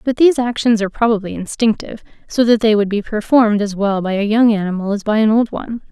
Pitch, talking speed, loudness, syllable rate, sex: 220 Hz, 235 wpm, -16 LUFS, 6.5 syllables/s, female